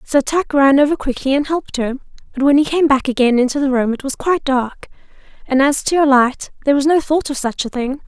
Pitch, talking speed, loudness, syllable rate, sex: 275 Hz, 255 wpm, -16 LUFS, 6.1 syllables/s, female